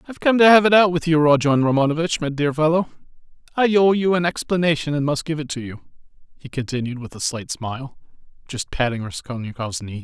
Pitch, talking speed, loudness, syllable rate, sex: 150 Hz, 205 wpm, -19 LUFS, 6.1 syllables/s, male